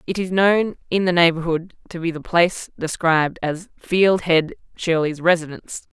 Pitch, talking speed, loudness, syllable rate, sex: 170 Hz, 160 wpm, -19 LUFS, 4.9 syllables/s, female